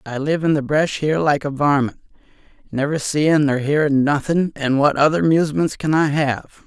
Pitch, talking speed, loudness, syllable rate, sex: 145 Hz, 190 wpm, -18 LUFS, 5.0 syllables/s, male